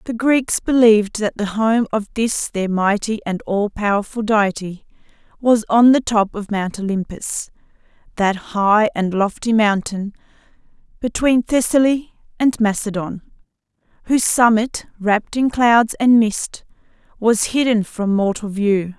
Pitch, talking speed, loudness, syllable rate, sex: 215 Hz, 135 wpm, -17 LUFS, 4.1 syllables/s, female